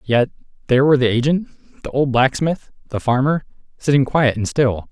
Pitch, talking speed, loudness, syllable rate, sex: 130 Hz, 170 wpm, -18 LUFS, 5.7 syllables/s, male